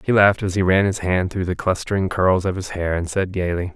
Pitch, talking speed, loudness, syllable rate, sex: 90 Hz, 270 wpm, -20 LUFS, 5.8 syllables/s, male